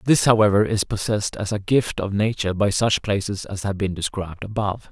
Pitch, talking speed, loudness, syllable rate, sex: 100 Hz, 205 wpm, -22 LUFS, 5.9 syllables/s, male